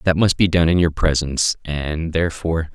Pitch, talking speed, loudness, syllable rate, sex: 80 Hz, 195 wpm, -19 LUFS, 5.5 syllables/s, male